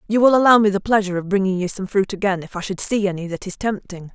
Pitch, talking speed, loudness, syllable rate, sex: 195 Hz, 290 wpm, -19 LUFS, 6.8 syllables/s, female